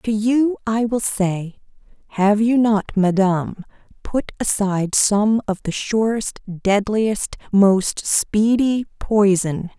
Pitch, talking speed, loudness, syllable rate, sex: 210 Hz, 115 wpm, -19 LUFS, 3.3 syllables/s, female